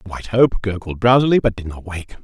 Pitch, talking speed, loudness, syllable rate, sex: 105 Hz, 240 wpm, -17 LUFS, 6.0 syllables/s, male